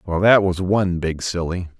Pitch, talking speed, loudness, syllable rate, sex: 90 Hz, 200 wpm, -19 LUFS, 4.9 syllables/s, male